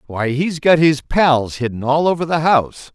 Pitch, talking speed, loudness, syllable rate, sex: 145 Hz, 205 wpm, -16 LUFS, 4.7 syllables/s, male